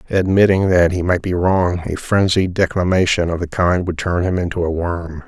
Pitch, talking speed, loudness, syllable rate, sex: 90 Hz, 205 wpm, -17 LUFS, 5.0 syllables/s, male